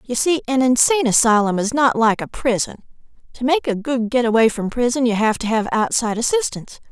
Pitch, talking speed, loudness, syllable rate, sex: 240 Hz, 210 wpm, -18 LUFS, 5.9 syllables/s, female